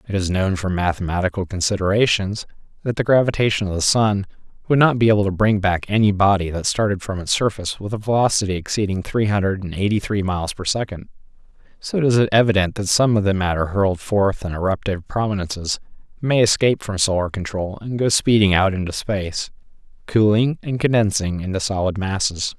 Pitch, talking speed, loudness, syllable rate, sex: 100 Hz, 185 wpm, -19 LUFS, 5.9 syllables/s, male